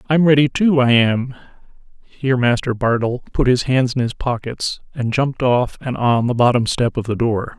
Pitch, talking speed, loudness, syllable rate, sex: 125 Hz, 200 wpm, -17 LUFS, 4.9 syllables/s, male